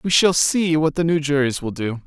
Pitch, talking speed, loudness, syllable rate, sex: 150 Hz, 260 wpm, -19 LUFS, 5.0 syllables/s, male